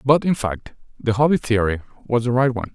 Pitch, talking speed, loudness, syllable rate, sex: 120 Hz, 220 wpm, -20 LUFS, 6.3 syllables/s, male